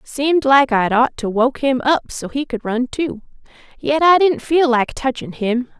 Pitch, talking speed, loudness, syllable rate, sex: 260 Hz, 205 wpm, -17 LUFS, 4.4 syllables/s, female